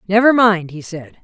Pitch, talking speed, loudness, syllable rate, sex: 195 Hz, 195 wpm, -14 LUFS, 4.9 syllables/s, female